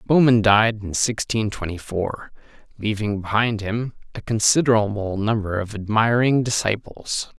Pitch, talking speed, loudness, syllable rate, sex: 110 Hz, 120 wpm, -21 LUFS, 4.5 syllables/s, male